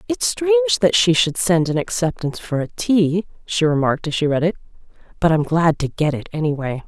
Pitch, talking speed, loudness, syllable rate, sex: 170 Hz, 210 wpm, -19 LUFS, 5.8 syllables/s, female